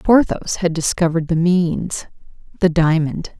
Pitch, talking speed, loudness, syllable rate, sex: 170 Hz, 125 wpm, -18 LUFS, 4.3 syllables/s, female